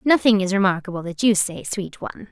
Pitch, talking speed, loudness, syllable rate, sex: 195 Hz, 205 wpm, -20 LUFS, 6.0 syllables/s, female